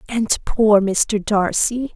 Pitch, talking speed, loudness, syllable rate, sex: 215 Hz, 125 wpm, -18 LUFS, 2.8 syllables/s, female